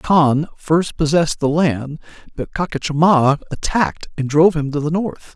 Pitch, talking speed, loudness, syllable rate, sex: 155 Hz, 155 wpm, -17 LUFS, 4.7 syllables/s, male